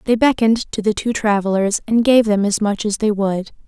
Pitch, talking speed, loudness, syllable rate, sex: 215 Hz, 230 wpm, -17 LUFS, 5.3 syllables/s, female